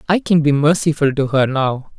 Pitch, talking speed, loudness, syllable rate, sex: 145 Hz, 210 wpm, -16 LUFS, 5.1 syllables/s, male